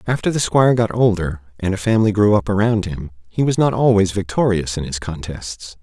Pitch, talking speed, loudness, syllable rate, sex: 100 Hz, 205 wpm, -18 LUFS, 5.6 syllables/s, male